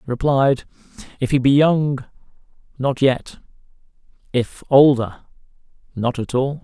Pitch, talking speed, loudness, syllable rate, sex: 130 Hz, 110 wpm, -18 LUFS, 3.9 syllables/s, male